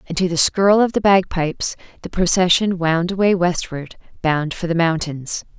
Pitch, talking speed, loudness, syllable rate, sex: 175 Hz, 170 wpm, -18 LUFS, 4.7 syllables/s, female